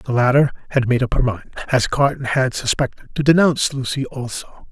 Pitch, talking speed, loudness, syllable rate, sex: 130 Hz, 190 wpm, -19 LUFS, 5.3 syllables/s, male